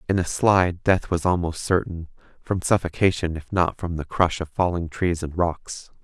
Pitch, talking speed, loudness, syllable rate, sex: 85 Hz, 190 wpm, -23 LUFS, 4.8 syllables/s, male